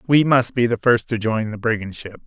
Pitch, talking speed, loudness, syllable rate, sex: 115 Hz, 265 wpm, -19 LUFS, 5.3 syllables/s, male